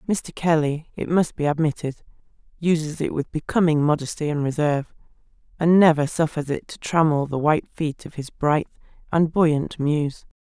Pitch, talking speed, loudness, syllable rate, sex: 155 Hz, 160 wpm, -22 LUFS, 4.9 syllables/s, female